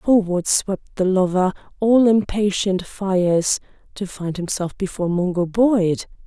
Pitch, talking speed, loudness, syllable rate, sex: 190 Hz, 115 wpm, -20 LUFS, 4.2 syllables/s, female